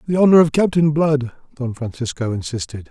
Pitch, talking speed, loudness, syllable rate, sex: 140 Hz, 165 wpm, -18 LUFS, 5.6 syllables/s, male